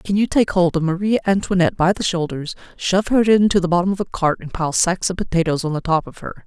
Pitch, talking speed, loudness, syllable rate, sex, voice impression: 180 Hz, 260 wpm, -18 LUFS, 6.2 syllables/s, female, very feminine, middle-aged, slightly thin, tensed, powerful, slightly dark, soft, slightly muffled, fluent, slightly cool, intellectual, slightly refreshing, very sincere, calm, slightly friendly, slightly reassuring, very unique, slightly elegant, slightly wild, slightly sweet, slightly lively, kind, slightly modest